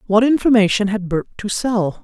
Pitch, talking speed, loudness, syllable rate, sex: 210 Hz, 175 wpm, -17 LUFS, 5.7 syllables/s, female